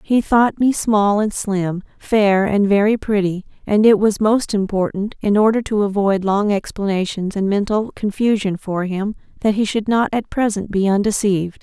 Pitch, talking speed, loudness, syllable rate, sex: 205 Hz, 175 wpm, -18 LUFS, 4.6 syllables/s, female